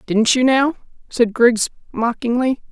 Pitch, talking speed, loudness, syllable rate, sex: 240 Hz, 135 wpm, -17 LUFS, 4.0 syllables/s, female